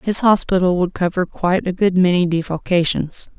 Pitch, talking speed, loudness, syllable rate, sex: 180 Hz, 160 wpm, -17 LUFS, 5.3 syllables/s, female